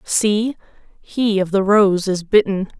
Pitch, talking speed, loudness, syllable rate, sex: 200 Hz, 150 wpm, -17 LUFS, 3.7 syllables/s, female